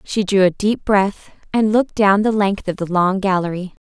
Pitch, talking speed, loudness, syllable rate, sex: 195 Hz, 215 wpm, -17 LUFS, 4.9 syllables/s, female